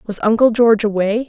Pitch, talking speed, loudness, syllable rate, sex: 220 Hz, 190 wpm, -15 LUFS, 6.1 syllables/s, female